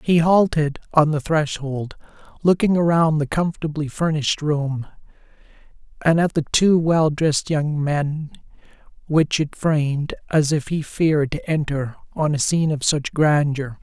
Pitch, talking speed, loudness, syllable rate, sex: 150 Hz, 150 wpm, -20 LUFS, 4.4 syllables/s, male